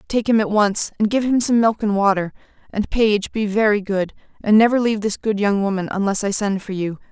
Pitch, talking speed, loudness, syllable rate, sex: 210 Hz, 235 wpm, -19 LUFS, 5.6 syllables/s, female